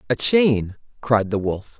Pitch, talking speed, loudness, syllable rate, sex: 120 Hz, 170 wpm, -20 LUFS, 3.7 syllables/s, male